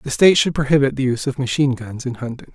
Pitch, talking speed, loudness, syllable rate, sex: 135 Hz, 260 wpm, -18 LUFS, 7.2 syllables/s, male